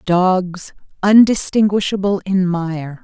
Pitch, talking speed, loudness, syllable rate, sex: 190 Hz, 80 wpm, -15 LUFS, 3.4 syllables/s, female